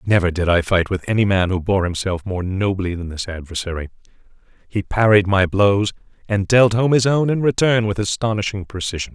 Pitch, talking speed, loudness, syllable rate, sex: 100 Hz, 190 wpm, -19 LUFS, 5.5 syllables/s, male